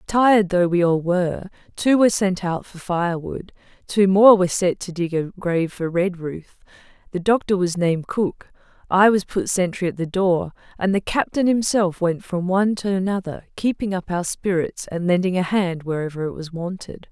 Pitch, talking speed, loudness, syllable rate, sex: 185 Hz, 190 wpm, -21 LUFS, 5.1 syllables/s, female